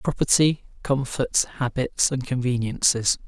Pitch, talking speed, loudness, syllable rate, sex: 130 Hz, 90 wpm, -23 LUFS, 4.0 syllables/s, male